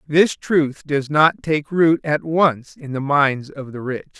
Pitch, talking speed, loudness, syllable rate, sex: 150 Hz, 200 wpm, -19 LUFS, 3.6 syllables/s, male